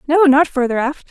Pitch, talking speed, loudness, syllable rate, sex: 285 Hz, 220 wpm, -15 LUFS, 5.4 syllables/s, female